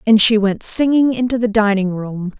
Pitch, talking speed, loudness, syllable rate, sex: 215 Hz, 200 wpm, -15 LUFS, 4.9 syllables/s, female